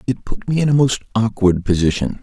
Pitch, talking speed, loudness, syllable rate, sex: 115 Hz, 215 wpm, -17 LUFS, 5.6 syllables/s, male